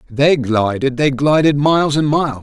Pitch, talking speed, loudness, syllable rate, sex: 140 Hz, 150 wpm, -15 LUFS, 4.9 syllables/s, male